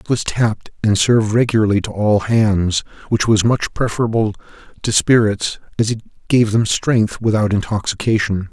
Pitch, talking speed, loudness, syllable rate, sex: 110 Hz, 155 wpm, -17 LUFS, 5.1 syllables/s, male